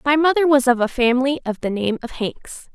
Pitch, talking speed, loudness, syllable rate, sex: 260 Hz, 240 wpm, -19 LUFS, 5.5 syllables/s, female